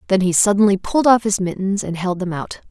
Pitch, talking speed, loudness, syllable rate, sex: 195 Hz, 245 wpm, -17 LUFS, 6.2 syllables/s, female